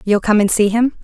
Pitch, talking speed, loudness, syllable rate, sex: 215 Hz, 290 wpm, -14 LUFS, 5.6 syllables/s, female